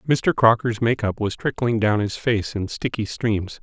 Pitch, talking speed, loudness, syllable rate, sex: 110 Hz, 180 wpm, -22 LUFS, 4.4 syllables/s, male